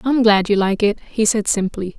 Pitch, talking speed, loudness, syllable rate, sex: 210 Hz, 275 wpm, -17 LUFS, 5.7 syllables/s, female